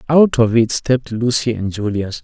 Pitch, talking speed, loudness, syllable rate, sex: 115 Hz, 190 wpm, -16 LUFS, 4.9 syllables/s, male